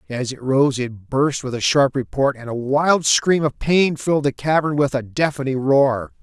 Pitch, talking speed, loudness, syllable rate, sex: 135 Hz, 210 wpm, -19 LUFS, 4.5 syllables/s, male